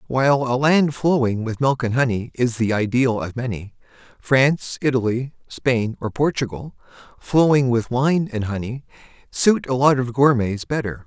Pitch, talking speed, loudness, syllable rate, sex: 125 Hz, 155 wpm, -20 LUFS, 4.6 syllables/s, male